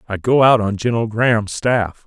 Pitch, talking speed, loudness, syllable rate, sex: 110 Hz, 205 wpm, -16 LUFS, 5.3 syllables/s, male